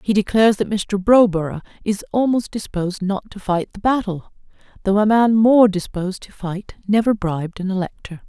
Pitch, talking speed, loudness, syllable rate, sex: 200 Hz, 175 wpm, -19 LUFS, 5.3 syllables/s, female